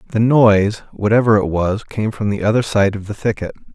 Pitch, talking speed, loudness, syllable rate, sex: 105 Hz, 210 wpm, -16 LUFS, 5.7 syllables/s, male